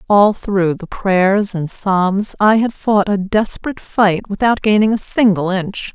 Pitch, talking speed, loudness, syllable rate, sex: 200 Hz, 170 wpm, -15 LUFS, 4.1 syllables/s, female